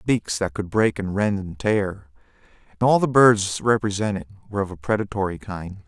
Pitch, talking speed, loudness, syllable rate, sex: 100 Hz, 165 wpm, -22 LUFS, 5.0 syllables/s, male